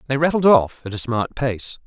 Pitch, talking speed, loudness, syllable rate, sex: 130 Hz, 225 wpm, -19 LUFS, 5.0 syllables/s, male